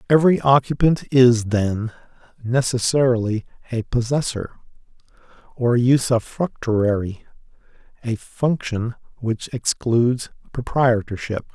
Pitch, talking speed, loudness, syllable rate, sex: 120 Hz, 70 wpm, -20 LUFS, 4.2 syllables/s, male